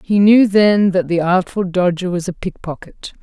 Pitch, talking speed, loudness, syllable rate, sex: 185 Hz, 185 wpm, -15 LUFS, 4.6 syllables/s, female